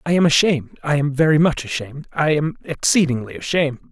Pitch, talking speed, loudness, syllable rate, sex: 150 Hz, 155 wpm, -19 LUFS, 6.3 syllables/s, male